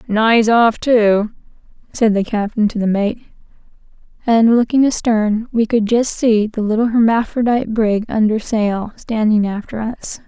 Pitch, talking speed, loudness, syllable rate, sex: 220 Hz, 145 wpm, -16 LUFS, 4.4 syllables/s, female